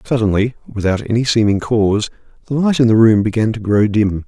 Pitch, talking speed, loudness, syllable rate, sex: 110 Hz, 195 wpm, -15 LUFS, 5.8 syllables/s, male